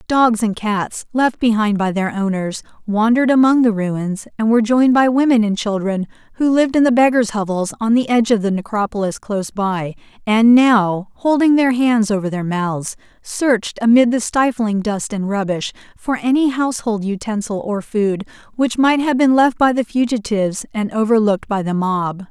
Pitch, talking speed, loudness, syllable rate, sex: 220 Hz, 180 wpm, -17 LUFS, 5.0 syllables/s, female